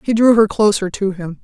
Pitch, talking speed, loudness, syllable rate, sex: 205 Hz, 250 wpm, -15 LUFS, 5.3 syllables/s, female